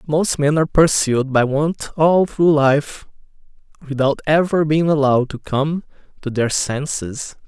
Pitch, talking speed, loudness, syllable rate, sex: 145 Hz, 145 wpm, -17 LUFS, 4.2 syllables/s, male